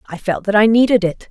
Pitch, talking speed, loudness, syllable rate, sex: 205 Hz, 275 wpm, -15 LUFS, 5.9 syllables/s, female